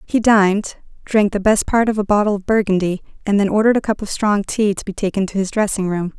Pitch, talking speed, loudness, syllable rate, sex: 205 Hz, 250 wpm, -17 LUFS, 6.1 syllables/s, female